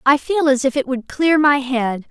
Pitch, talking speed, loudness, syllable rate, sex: 275 Hz, 255 wpm, -17 LUFS, 4.5 syllables/s, female